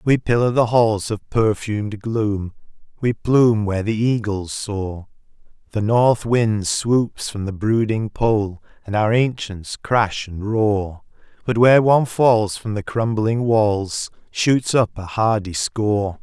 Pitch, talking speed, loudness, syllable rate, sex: 110 Hz, 150 wpm, -19 LUFS, 3.8 syllables/s, male